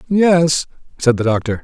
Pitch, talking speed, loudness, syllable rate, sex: 145 Hz, 145 wpm, -15 LUFS, 4.4 syllables/s, male